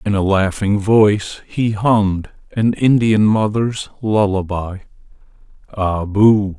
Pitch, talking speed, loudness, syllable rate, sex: 105 Hz, 110 wpm, -16 LUFS, 3.6 syllables/s, male